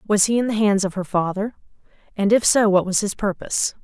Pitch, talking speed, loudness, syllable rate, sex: 205 Hz, 235 wpm, -20 LUFS, 5.8 syllables/s, female